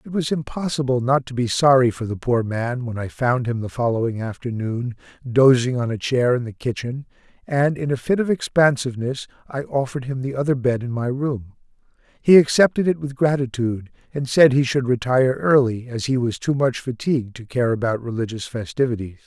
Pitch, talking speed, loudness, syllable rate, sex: 125 Hz, 195 wpm, -21 LUFS, 5.5 syllables/s, male